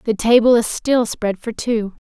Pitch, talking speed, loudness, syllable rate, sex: 225 Hz, 205 wpm, -17 LUFS, 4.4 syllables/s, female